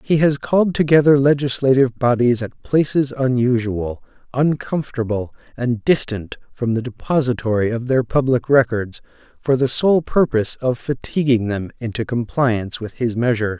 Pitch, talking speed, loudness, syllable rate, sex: 125 Hz, 135 wpm, -19 LUFS, 5.0 syllables/s, male